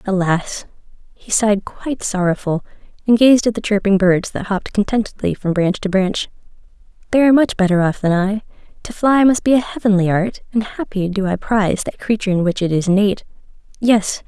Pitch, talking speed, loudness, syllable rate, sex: 205 Hz, 190 wpm, -17 LUFS, 5.7 syllables/s, female